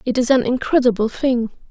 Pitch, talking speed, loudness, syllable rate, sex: 245 Hz, 175 wpm, -18 LUFS, 5.5 syllables/s, female